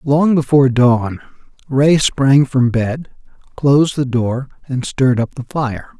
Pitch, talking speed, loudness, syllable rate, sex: 135 Hz, 150 wpm, -15 LUFS, 4.0 syllables/s, male